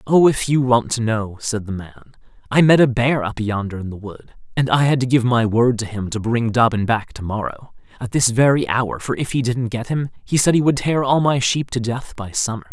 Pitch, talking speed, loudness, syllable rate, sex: 120 Hz, 260 wpm, -19 LUFS, 5.2 syllables/s, male